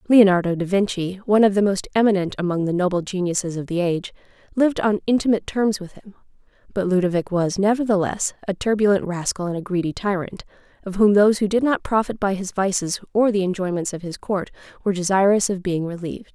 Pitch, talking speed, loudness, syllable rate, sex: 195 Hz, 195 wpm, -21 LUFS, 6.3 syllables/s, female